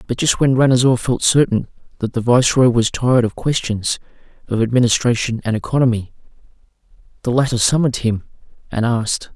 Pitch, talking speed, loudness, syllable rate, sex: 120 Hz, 150 wpm, -17 LUFS, 6.0 syllables/s, male